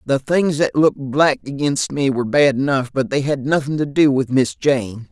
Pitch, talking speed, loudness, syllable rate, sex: 140 Hz, 225 wpm, -18 LUFS, 4.9 syllables/s, male